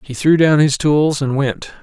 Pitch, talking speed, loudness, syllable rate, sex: 145 Hz, 230 wpm, -15 LUFS, 4.3 syllables/s, male